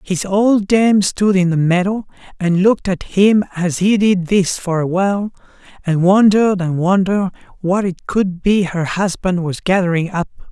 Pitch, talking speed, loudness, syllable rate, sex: 190 Hz, 175 wpm, -16 LUFS, 4.6 syllables/s, male